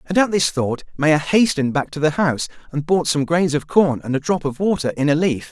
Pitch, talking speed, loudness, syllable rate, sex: 155 Hz, 260 wpm, -19 LUFS, 5.6 syllables/s, male